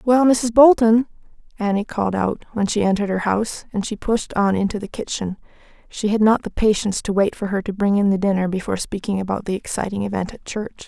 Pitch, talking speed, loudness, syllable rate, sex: 205 Hz, 220 wpm, -20 LUFS, 6.0 syllables/s, female